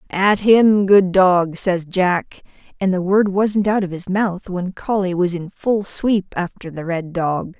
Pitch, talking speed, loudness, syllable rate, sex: 190 Hz, 190 wpm, -18 LUFS, 3.7 syllables/s, female